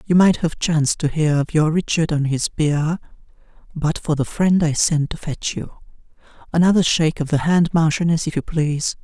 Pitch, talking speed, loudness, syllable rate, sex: 160 Hz, 200 wpm, -19 LUFS, 5.2 syllables/s, male